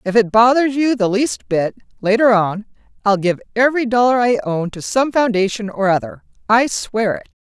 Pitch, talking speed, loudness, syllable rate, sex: 220 Hz, 185 wpm, -16 LUFS, 5.1 syllables/s, female